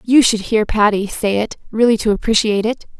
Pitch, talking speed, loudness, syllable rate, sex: 215 Hz, 200 wpm, -16 LUFS, 5.6 syllables/s, female